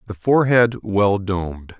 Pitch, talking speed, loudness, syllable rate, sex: 105 Hz, 135 wpm, -18 LUFS, 4.6 syllables/s, male